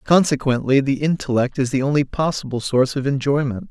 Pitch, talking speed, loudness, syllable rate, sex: 140 Hz, 160 wpm, -19 LUFS, 5.8 syllables/s, male